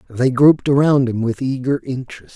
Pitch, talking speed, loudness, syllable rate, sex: 130 Hz, 180 wpm, -17 LUFS, 5.6 syllables/s, male